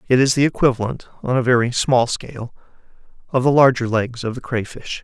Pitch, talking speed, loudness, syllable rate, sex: 125 Hz, 190 wpm, -18 LUFS, 5.7 syllables/s, male